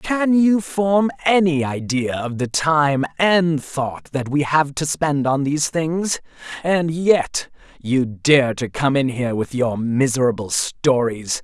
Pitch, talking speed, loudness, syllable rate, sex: 145 Hz, 155 wpm, -19 LUFS, 3.7 syllables/s, male